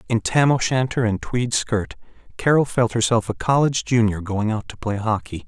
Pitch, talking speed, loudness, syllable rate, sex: 115 Hz, 185 wpm, -21 LUFS, 5.1 syllables/s, male